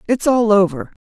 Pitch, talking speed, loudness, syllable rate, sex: 210 Hz, 170 wpm, -15 LUFS, 5.1 syllables/s, female